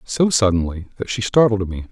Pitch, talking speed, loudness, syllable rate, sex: 105 Hz, 190 wpm, -18 LUFS, 5.3 syllables/s, male